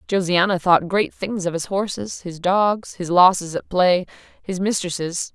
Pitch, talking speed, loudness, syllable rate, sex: 185 Hz, 170 wpm, -20 LUFS, 4.4 syllables/s, female